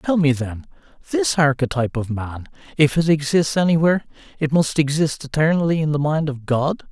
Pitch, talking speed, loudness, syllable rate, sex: 145 Hz, 165 wpm, -19 LUFS, 5.5 syllables/s, male